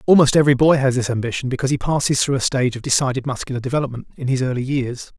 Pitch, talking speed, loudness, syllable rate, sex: 130 Hz, 230 wpm, -19 LUFS, 7.6 syllables/s, male